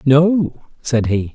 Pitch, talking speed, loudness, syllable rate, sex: 140 Hz, 135 wpm, -17 LUFS, 2.7 syllables/s, male